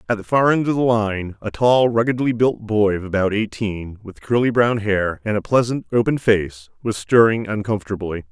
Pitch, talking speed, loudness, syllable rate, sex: 110 Hz, 195 wpm, -19 LUFS, 5.0 syllables/s, male